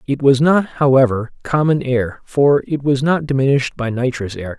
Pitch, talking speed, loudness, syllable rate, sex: 135 Hz, 185 wpm, -16 LUFS, 4.9 syllables/s, male